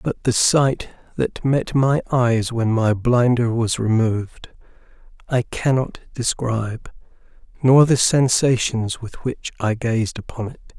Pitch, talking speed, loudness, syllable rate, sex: 120 Hz, 135 wpm, -19 LUFS, 3.8 syllables/s, male